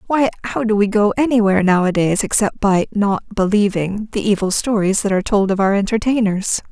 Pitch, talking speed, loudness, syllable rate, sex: 205 Hz, 180 wpm, -17 LUFS, 5.7 syllables/s, female